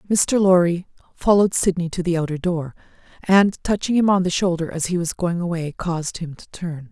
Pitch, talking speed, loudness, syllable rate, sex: 175 Hz, 200 wpm, -20 LUFS, 5.4 syllables/s, female